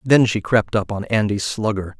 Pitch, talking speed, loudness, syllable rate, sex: 105 Hz, 210 wpm, -19 LUFS, 4.8 syllables/s, male